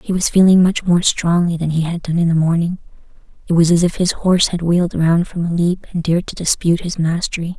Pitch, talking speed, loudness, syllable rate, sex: 170 Hz, 245 wpm, -16 LUFS, 6.0 syllables/s, female